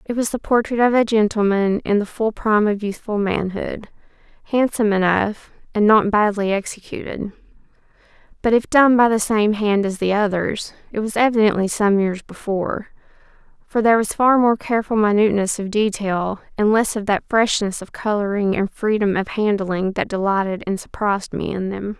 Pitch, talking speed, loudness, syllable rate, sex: 210 Hz, 170 wpm, -19 LUFS, 5.2 syllables/s, female